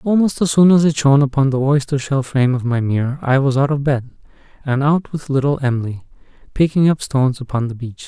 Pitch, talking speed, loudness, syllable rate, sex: 140 Hz, 225 wpm, -17 LUFS, 5.9 syllables/s, male